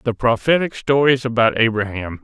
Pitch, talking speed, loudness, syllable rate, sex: 120 Hz, 135 wpm, -17 LUFS, 5.2 syllables/s, male